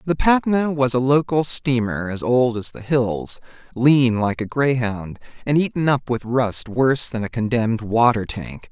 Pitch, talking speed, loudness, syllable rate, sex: 125 Hz, 180 wpm, -20 LUFS, 4.4 syllables/s, male